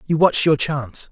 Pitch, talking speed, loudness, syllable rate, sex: 145 Hz, 215 wpm, -18 LUFS, 5.1 syllables/s, male